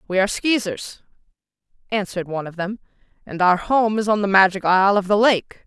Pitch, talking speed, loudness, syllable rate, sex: 200 Hz, 190 wpm, -19 LUFS, 6.0 syllables/s, female